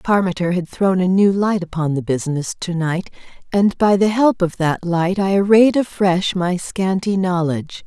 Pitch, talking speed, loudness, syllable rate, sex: 185 Hz, 175 wpm, -18 LUFS, 4.6 syllables/s, female